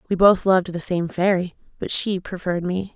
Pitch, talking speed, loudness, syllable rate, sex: 185 Hz, 205 wpm, -21 LUFS, 5.6 syllables/s, female